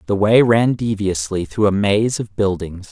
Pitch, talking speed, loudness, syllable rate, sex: 100 Hz, 185 wpm, -17 LUFS, 4.4 syllables/s, male